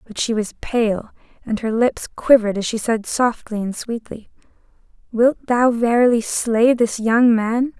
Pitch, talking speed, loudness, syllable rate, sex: 230 Hz, 160 wpm, -18 LUFS, 4.3 syllables/s, female